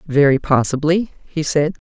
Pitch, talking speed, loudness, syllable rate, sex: 155 Hz, 130 wpm, -17 LUFS, 4.5 syllables/s, female